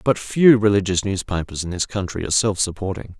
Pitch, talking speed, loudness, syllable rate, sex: 100 Hz, 190 wpm, -20 LUFS, 5.8 syllables/s, male